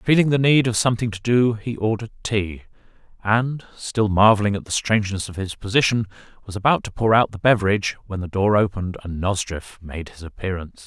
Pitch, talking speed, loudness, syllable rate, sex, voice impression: 105 Hz, 195 wpm, -21 LUFS, 5.9 syllables/s, male, masculine, middle-aged, tensed, powerful, slightly hard, slightly halting, intellectual, sincere, calm, mature, friendly, wild, lively, slightly kind, slightly sharp